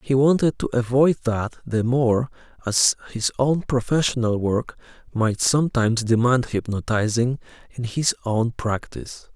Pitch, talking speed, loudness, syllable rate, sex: 120 Hz, 130 wpm, -21 LUFS, 4.5 syllables/s, male